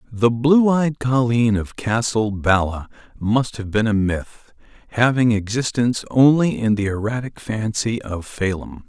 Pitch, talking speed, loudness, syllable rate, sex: 115 Hz, 135 wpm, -19 LUFS, 4.2 syllables/s, male